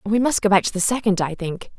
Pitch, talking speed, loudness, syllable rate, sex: 200 Hz, 300 wpm, -20 LUFS, 6.2 syllables/s, female